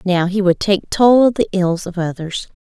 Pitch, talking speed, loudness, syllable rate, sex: 190 Hz, 225 wpm, -16 LUFS, 4.7 syllables/s, female